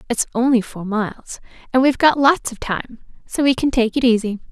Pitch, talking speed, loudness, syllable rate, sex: 245 Hz, 215 wpm, -18 LUFS, 5.5 syllables/s, female